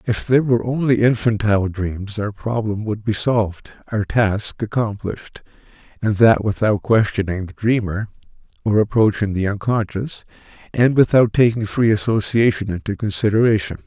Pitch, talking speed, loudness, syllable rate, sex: 105 Hz, 135 wpm, -19 LUFS, 5.0 syllables/s, male